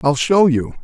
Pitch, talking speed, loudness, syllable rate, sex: 150 Hz, 215 wpm, -15 LUFS, 4.6 syllables/s, male